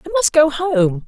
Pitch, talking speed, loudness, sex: 295 Hz, 225 wpm, -16 LUFS, female